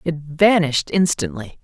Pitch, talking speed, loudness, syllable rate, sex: 165 Hz, 110 wpm, -18 LUFS, 4.6 syllables/s, female